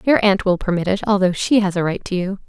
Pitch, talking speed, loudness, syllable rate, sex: 190 Hz, 290 wpm, -18 LUFS, 6.2 syllables/s, female